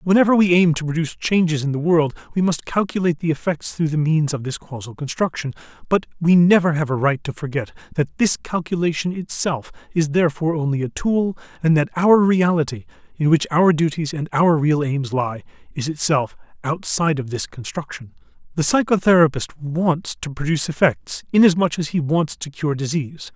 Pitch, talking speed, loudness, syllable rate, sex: 160 Hz, 180 wpm, -20 LUFS, 5.5 syllables/s, male